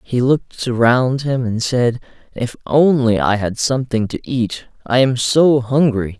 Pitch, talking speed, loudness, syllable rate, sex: 125 Hz, 165 wpm, -16 LUFS, 4.2 syllables/s, male